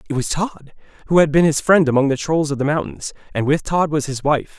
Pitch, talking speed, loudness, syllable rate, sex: 150 Hz, 260 wpm, -18 LUFS, 5.7 syllables/s, male